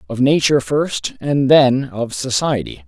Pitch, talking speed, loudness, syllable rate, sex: 130 Hz, 145 wpm, -16 LUFS, 4.2 syllables/s, male